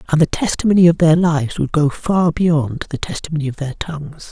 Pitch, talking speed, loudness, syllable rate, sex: 155 Hz, 210 wpm, -17 LUFS, 5.6 syllables/s, male